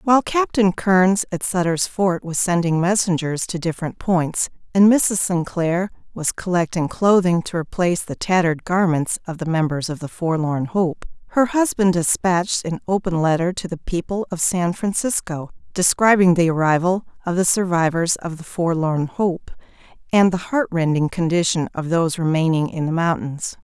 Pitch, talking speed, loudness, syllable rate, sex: 175 Hz, 160 wpm, -20 LUFS, 4.8 syllables/s, female